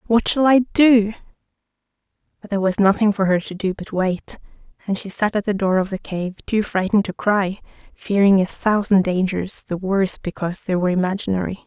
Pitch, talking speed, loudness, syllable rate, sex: 200 Hz, 190 wpm, -19 LUFS, 5.6 syllables/s, female